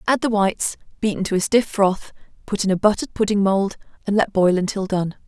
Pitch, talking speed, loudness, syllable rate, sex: 200 Hz, 215 wpm, -20 LUFS, 5.9 syllables/s, female